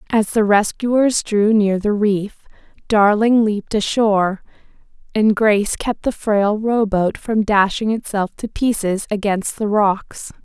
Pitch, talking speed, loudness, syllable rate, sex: 210 Hz, 140 wpm, -17 LUFS, 3.9 syllables/s, female